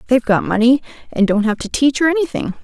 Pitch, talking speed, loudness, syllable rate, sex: 250 Hz, 230 wpm, -16 LUFS, 6.7 syllables/s, female